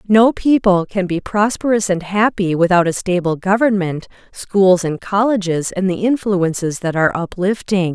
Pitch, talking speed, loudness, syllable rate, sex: 190 Hz, 150 wpm, -16 LUFS, 4.6 syllables/s, female